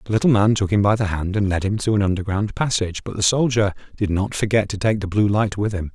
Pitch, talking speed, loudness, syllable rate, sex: 100 Hz, 285 wpm, -20 LUFS, 6.3 syllables/s, male